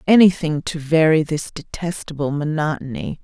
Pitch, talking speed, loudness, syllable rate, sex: 155 Hz, 110 wpm, -19 LUFS, 4.9 syllables/s, female